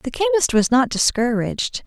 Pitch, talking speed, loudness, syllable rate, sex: 270 Hz, 160 wpm, -18 LUFS, 4.9 syllables/s, female